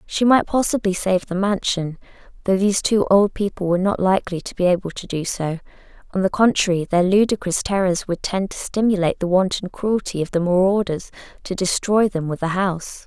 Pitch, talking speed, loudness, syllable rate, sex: 190 Hz, 190 wpm, -20 LUFS, 5.6 syllables/s, female